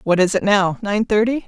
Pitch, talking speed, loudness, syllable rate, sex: 205 Hz, 205 wpm, -17 LUFS, 5.2 syllables/s, female